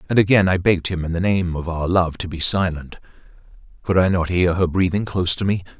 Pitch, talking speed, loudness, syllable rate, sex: 90 Hz, 240 wpm, -19 LUFS, 6.0 syllables/s, male